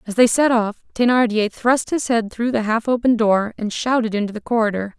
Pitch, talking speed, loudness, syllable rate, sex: 225 Hz, 215 wpm, -19 LUFS, 5.3 syllables/s, female